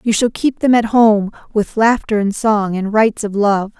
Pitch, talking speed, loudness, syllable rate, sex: 215 Hz, 220 wpm, -15 LUFS, 4.7 syllables/s, female